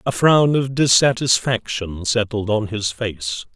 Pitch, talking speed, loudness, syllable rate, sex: 115 Hz, 135 wpm, -18 LUFS, 3.8 syllables/s, male